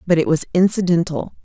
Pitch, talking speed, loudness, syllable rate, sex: 170 Hz, 165 wpm, -18 LUFS, 6.2 syllables/s, female